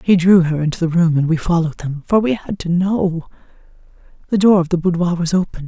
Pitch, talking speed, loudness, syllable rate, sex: 175 Hz, 210 wpm, -16 LUFS, 6.0 syllables/s, female